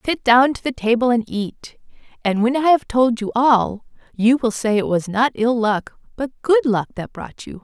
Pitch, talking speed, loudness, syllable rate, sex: 240 Hz, 220 wpm, -18 LUFS, 4.6 syllables/s, female